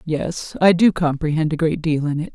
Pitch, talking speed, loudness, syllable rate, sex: 160 Hz, 230 wpm, -19 LUFS, 5.1 syllables/s, female